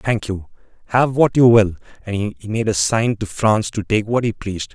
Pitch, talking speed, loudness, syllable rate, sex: 105 Hz, 255 wpm, -18 LUFS, 5.6 syllables/s, male